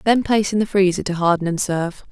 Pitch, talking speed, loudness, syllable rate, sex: 190 Hz, 255 wpm, -19 LUFS, 6.6 syllables/s, female